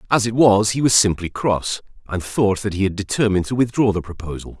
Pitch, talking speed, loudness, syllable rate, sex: 105 Hz, 220 wpm, -19 LUFS, 5.8 syllables/s, male